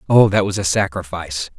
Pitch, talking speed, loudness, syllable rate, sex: 90 Hz, 190 wpm, -18 LUFS, 5.9 syllables/s, male